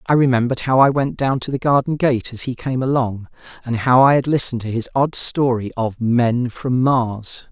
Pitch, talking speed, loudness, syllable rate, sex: 125 Hz, 215 wpm, -18 LUFS, 5.1 syllables/s, male